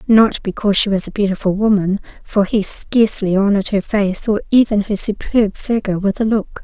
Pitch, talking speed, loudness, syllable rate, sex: 205 Hz, 190 wpm, -16 LUFS, 5.5 syllables/s, female